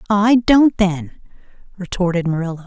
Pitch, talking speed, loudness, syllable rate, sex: 195 Hz, 115 wpm, -16 LUFS, 4.8 syllables/s, female